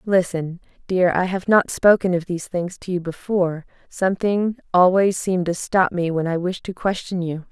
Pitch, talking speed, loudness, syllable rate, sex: 180 Hz, 190 wpm, -20 LUFS, 5.0 syllables/s, female